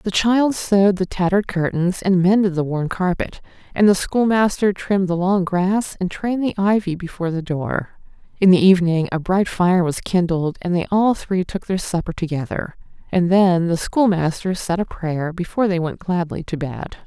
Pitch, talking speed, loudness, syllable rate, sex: 185 Hz, 190 wpm, -19 LUFS, 5.0 syllables/s, female